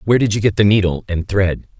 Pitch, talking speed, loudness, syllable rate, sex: 100 Hz, 300 wpm, -16 LUFS, 7.4 syllables/s, male